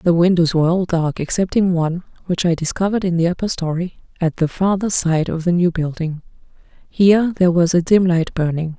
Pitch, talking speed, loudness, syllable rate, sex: 175 Hz, 200 wpm, -17 LUFS, 5.8 syllables/s, female